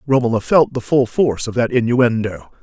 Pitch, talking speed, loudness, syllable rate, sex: 125 Hz, 185 wpm, -17 LUFS, 5.4 syllables/s, male